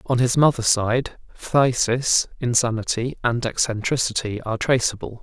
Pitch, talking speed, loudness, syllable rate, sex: 120 Hz, 115 wpm, -21 LUFS, 4.6 syllables/s, male